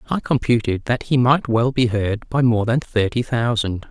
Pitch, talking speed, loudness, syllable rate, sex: 120 Hz, 200 wpm, -19 LUFS, 4.6 syllables/s, male